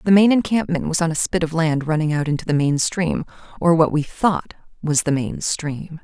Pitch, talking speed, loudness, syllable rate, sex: 160 Hz, 230 wpm, -20 LUFS, 5.1 syllables/s, female